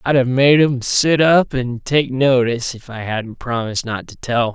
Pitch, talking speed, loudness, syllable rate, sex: 125 Hz, 210 wpm, -17 LUFS, 4.5 syllables/s, male